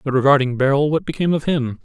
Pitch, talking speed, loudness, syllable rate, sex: 140 Hz, 230 wpm, -18 LUFS, 7.0 syllables/s, male